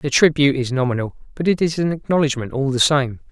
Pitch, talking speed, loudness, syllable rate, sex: 140 Hz, 215 wpm, -19 LUFS, 6.3 syllables/s, male